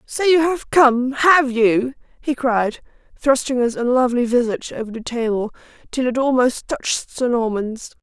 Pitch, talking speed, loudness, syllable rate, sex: 250 Hz, 155 wpm, -18 LUFS, 4.7 syllables/s, female